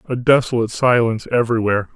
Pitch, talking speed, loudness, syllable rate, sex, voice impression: 115 Hz, 125 wpm, -17 LUFS, 7.4 syllables/s, male, masculine, thick, tensed, powerful, clear, halting, intellectual, friendly, wild, lively, kind